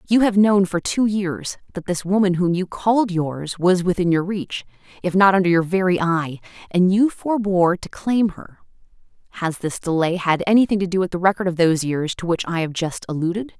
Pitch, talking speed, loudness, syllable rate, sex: 185 Hz, 210 wpm, -20 LUFS, 5.3 syllables/s, female